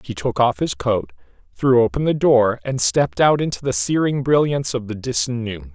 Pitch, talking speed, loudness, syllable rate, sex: 115 Hz, 210 wpm, -19 LUFS, 5.2 syllables/s, male